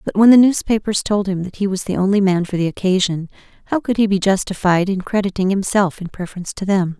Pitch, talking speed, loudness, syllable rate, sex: 195 Hz, 230 wpm, -17 LUFS, 6.2 syllables/s, female